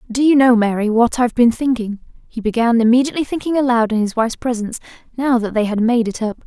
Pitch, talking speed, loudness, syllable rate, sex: 235 Hz, 225 wpm, -16 LUFS, 6.6 syllables/s, female